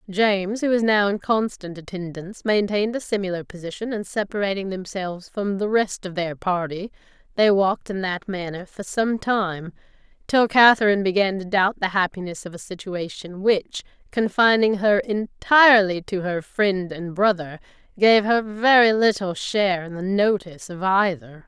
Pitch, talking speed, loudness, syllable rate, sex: 195 Hz, 160 wpm, -21 LUFS, 5.0 syllables/s, female